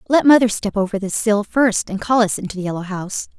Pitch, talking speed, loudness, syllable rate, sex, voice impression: 210 Hz, 250 wpm, -18 LUFS, 6.1 syllables/s, female, feminine, adult-like, tensed, powerful, bright, clear, fluent, intellectual, friendly, slightly reassuring, elegant, lively, slightly kind